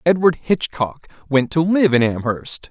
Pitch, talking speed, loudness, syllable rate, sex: 150 Hz, 155 wpm, -18 LUFS, 4.2 syllables/s, male